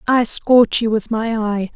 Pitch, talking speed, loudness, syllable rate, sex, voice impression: 225 Hz, 205 wpm, -17 LUFS, 3.8 syllables/s, female, very feminine, very young, very thin, tensed, slightly weak, very bright, hard, very clear, fluent, very cute, slightly intellectual, very refreshing, sincere, slightly calm, friendly, reassuring, very unique, slightly elegant, sweet, very lively, kind, slightly intense, very sharp, light